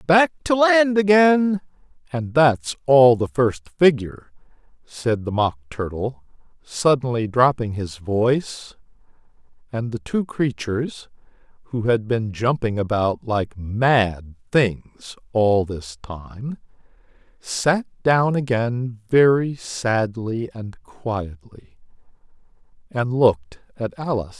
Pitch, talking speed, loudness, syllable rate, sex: 125 Hz, 110 wpm, -20 LUFS, 3.4 syllables/s, male